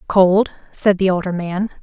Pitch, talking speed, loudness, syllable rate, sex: 190 Hz, 165 wpm, -17 LUFS, 4.4 syllables/s, female